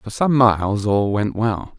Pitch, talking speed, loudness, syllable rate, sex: 110 Hz, 200 wpm, -18 LUFS, 4.0 syllables/s, male